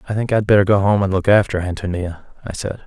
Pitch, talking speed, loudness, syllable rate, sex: 100 Hz, 250 wpm, -17 LUFS, 6.4 syllables/s, male